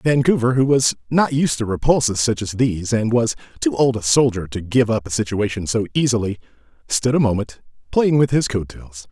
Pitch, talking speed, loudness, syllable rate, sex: 115 Hz, 205 wpm, -19 LUFS, 5.4 syllables/s, male